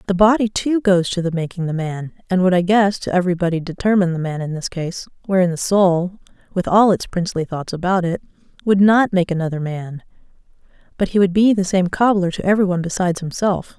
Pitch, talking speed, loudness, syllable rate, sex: 185 Hz, 210 wpm, -18 LUFS, 6.1 syllables/s, female